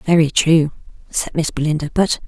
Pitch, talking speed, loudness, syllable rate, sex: 155 Hz, 160 wpm, -18 LUFS, 5.0 syllables/s, female